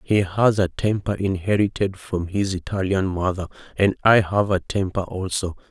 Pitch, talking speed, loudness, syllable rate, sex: 95 Hz, 160 wpm, -22 LUFS, 4.7 syllables/s, male